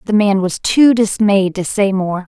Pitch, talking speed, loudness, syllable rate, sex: 200 Hz, 205 wpm, -14 LUFS, 4.2 syllables/s, female